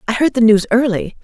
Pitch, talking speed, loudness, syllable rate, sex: 230 Hz, 240 wpm, -14 LUFS, 6.0 syllables/s, female